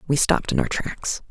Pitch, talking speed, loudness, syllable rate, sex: 145 Hz, 230 wpm, -23 LUFS, 5.5 syllables/s, female